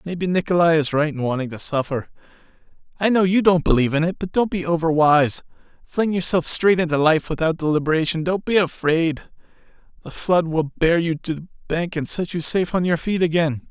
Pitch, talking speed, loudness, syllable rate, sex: 165 Hz, 195 wpm, -20 LUFS, 5.7 syllables/s, male